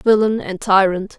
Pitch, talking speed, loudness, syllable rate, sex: 200 Hz, 150 wpm, -16 LUFS, 4.4 syllables/s, female